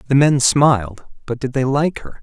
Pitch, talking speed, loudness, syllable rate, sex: 130 Hz, 190 wpm, -16 LUFS, 4.9 syllables/s, male